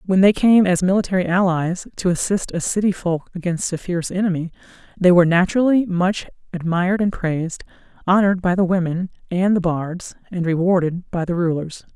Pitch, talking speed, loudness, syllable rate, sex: 180 Hz, 170 wpm, -19 LUFS, 5.6 syllables/s, female